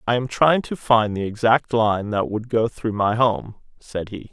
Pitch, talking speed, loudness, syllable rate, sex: 115 Hz, 220 wpm, -21 LUFS, 4.3 syllables/s, male